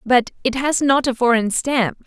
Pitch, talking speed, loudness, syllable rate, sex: 250 Hz, 205 wpm, -18 LUFS, 4.4 syllables/s, female